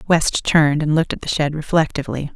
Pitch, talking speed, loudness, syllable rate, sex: 155 Hz, 205 wpm, -18 LUFS, 6.4 syllables/s, female